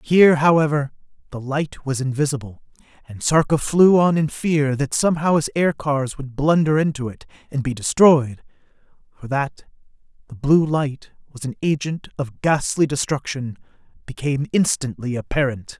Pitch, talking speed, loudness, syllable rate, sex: 145 Hz, 135 wpm, -20 LUFS, 4.9 syllables/s, male